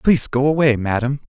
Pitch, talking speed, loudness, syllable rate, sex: 135 Hz, 185 wpm, -18 LUFS, 5.8 syllables/s, male